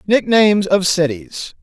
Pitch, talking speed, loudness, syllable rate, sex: 190 Hz, 110 wpm, -14 LUFS, 4.2 syllables/s, male